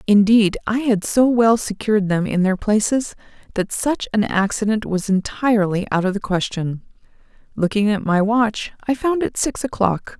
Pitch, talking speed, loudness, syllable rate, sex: 210 Hz, 170 wpm, -19 LUFS, 4.8 syllables/s, female